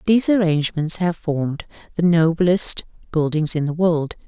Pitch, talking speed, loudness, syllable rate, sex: 165 Hz, 140 wpm, -19 LUFS, 4.9 syllables/s, female